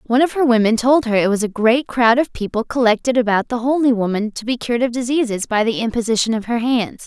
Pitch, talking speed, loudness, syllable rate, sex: 235 Hz, 245 wpm, -17 LUFS, 6.2 syllables/s, female